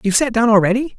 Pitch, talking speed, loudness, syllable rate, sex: 230 Hz, 245 wpm, -15 LUFS, 7.9 syllables/s, male